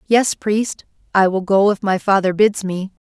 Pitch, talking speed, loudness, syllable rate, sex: 200 Hz, 195 wpm, -17 LUFS, 4.3 syllables/s, female